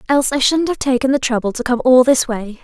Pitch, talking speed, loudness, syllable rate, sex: 255 Hz, 275 wpm, -15 LUFS, 6.1 syllables/s, female